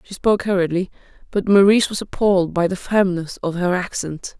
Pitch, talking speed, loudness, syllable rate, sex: 185 Hz, 175 wpm, -19 LUFS, 5.8 syllables/s, female